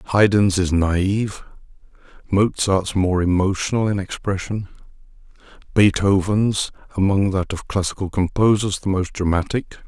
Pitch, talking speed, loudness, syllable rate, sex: 95 Hz, 105 wpm, -20 LUFS, 4.3 syllables/s, male